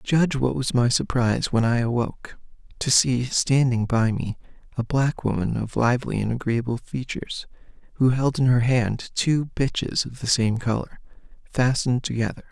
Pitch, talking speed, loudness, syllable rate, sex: 125 Hz, 165 wpm, -23 LUFS, 5.1 syllables/s, male